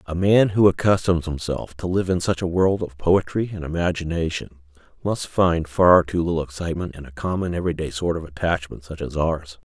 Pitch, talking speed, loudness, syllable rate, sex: 85 Hz, 200 wpm, -22 LUFS, 5.4 syllables/s, male